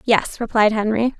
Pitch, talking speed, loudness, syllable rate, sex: 220 Hz, 150 wpm, -19 LUFS, 4.6 syllables/s, female